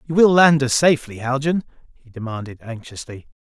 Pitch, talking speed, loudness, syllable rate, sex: 135 Hz, 155 wpm, -18 LUFS, 5.6 syllables/s, male